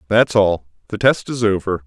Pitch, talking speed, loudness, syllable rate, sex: 100 Hz, 160 wpm, -17 LUFS, 5.0 syllables/s, male